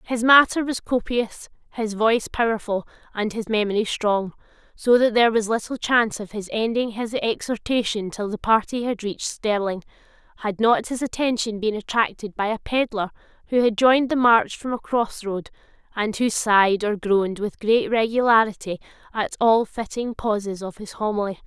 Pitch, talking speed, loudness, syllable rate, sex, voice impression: 220 Hz, 170 wpm, -22 LUFS, 5.1 syllables/s, female, feminine, slightly young, slightly clear, unique